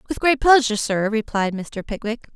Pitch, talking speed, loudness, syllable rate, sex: 230 Hz, 180 wpm, -20 LUFS, 5.4 syllables/s, female